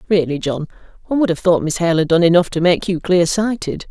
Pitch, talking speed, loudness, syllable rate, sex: 175 Hz, 245 wpm, -16 LUFS, 6.0 syllables/s, female